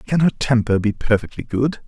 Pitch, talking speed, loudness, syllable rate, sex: 125 Hz, 190 wpm, -19 LUFS, 5.0 syllables/s, male